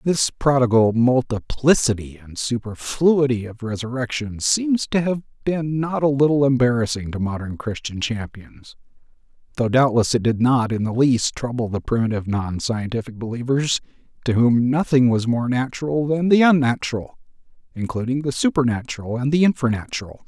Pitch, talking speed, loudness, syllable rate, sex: 125 Hz, 140 wpm, -20 LUFS, 5.1 syllables/s, male